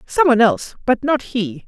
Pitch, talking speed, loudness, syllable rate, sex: 245 Hz, 215 wpm, -17 LUFS, 5.6 syllables/s, female